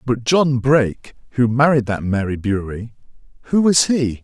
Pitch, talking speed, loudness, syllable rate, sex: 125 Hz, 140 wpm, -17 LUFS, 4.8 syllables/s, male